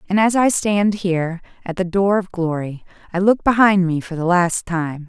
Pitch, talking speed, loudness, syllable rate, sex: 185 Hz, 215 wpm, -18 LUFS, 4.8 syllables/s, female